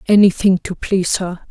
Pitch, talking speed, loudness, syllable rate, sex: 190 Hz, 160 wpm, -16 LUFS, 5.2 syllables/s, female